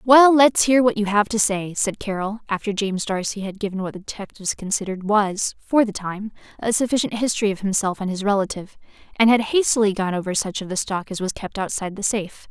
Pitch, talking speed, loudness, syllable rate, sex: 205 Hz, 220 wpm, -21 LUFS, 6.1 syllables/s, female